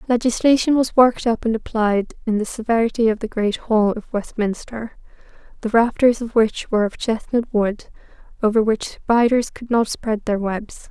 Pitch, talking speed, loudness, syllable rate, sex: 225 Hz, 170 wpm, -19 LUFS, 4.9 syllables/s, female